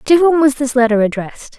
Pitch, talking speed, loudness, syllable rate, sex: 265 Hz, 230 wpm, -13 LUFS, 6.0 syllables/s, female